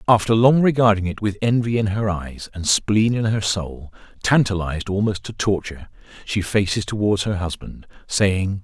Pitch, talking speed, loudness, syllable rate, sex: 100 Hz, 160 wpm, -20 LUFS, 5.0 syllables/s, male